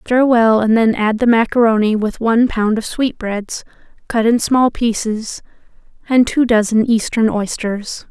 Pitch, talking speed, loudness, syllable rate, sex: 225 Hz, 155 wpm, -15 LUFS, 4.3 syllables/s, female